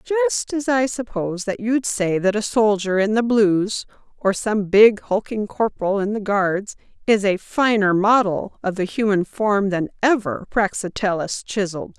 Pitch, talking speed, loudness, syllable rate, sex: 205 Hz, 165 wpm, -20 LUFS, 4.6 syllables/s, female